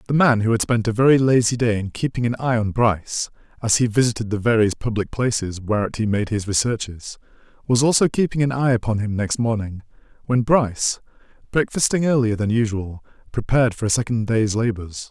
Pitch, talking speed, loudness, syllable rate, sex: 115 Hz, 190 wpm, -20 LUFS, 5.7 syllables/s, male